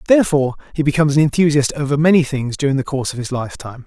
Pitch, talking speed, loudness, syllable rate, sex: 145 Hz, 215 wpm, -17 LUFS, 8.0 syllables/s, male